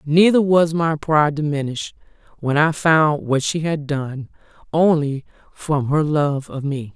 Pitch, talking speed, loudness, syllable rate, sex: 150 Hz, 155 wpm, -19 LUFS, 4.2 syllables/s, female